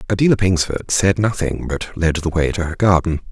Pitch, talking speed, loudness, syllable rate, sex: 90 Hz, 200 wpm, -18 LUFS, 5.5 syllables/s, male